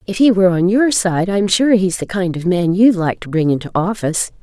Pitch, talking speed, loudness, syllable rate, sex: 190 Hz, 260 wpm, -15 LUFS, 5.5 syllables/s, female